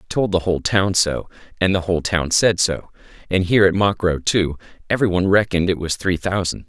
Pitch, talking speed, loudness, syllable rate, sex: 90 Hz, 215 wpm, -19 LUFS, 6.1 syllables/s, male